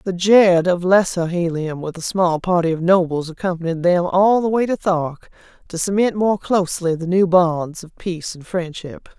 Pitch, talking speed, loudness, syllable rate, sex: 175 Hz, 190 wpm, -18 LUFS, 4.8 syllables/s, female